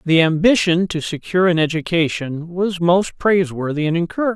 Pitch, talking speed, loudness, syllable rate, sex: 170 Hz, 150 wpm, -18 LUFS, 5.6 syllables/s, male